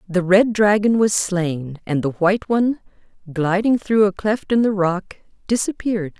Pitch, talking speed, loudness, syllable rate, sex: 200 Hz, 165 wpm, -19 LUFS, 4.6 syllables/s, female